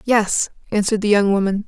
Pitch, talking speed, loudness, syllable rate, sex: 205 Hz, 180 wpm, -18 LUFS, 5.9 syllables/s, female